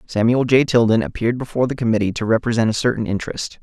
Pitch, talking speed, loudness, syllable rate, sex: 115 Hz, 200 wpm, -18 LUFS, 7.1 syllables/s, male